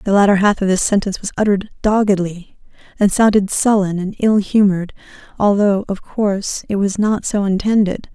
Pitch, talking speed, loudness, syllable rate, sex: 200 Hz, 170 wpm, -16 LUFS, 5.5 syllables/s, female